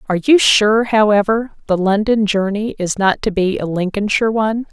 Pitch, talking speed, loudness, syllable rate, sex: 210 Hz, 180 wpm, -15 LUFS, 5.3 syllables/s, female